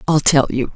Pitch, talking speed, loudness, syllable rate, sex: 145 Hz, 240 wpm, -15 LUFS, 5.5 syllables/s, female